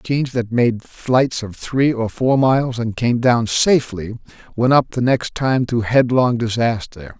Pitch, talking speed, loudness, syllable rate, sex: 120 Hz, 175 wpm, -17 LUFS, 4.4 syllables/s, male